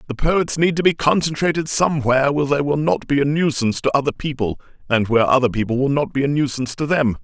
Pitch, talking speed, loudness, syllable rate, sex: 140 Hz, 230 wpm, -19 LUFS, 6.6 syllables/s, male